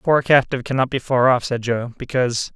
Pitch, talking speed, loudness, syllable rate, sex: 125 Hz, 235 wpm, -19 LUFS, 6.1 syllables/s, male